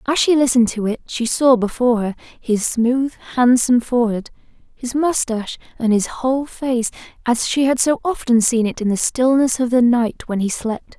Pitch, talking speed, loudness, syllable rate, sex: 245 Hz, 190 wpm, -18 LUFS, 5.1 syllables/s, female